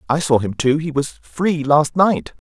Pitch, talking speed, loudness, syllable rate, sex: 145 Hz, 220 wpm, -18 LUFS, 4.1 syllables/s, male